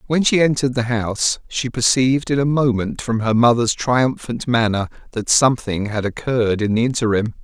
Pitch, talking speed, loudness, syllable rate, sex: 120 Hz, 180 wpm, -18 LUFS, 5.4 syllables/s, male